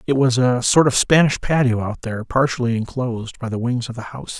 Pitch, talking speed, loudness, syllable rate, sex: 125 Hz, 230 wpm, -19 LUFS, 5.9 syllables/s, male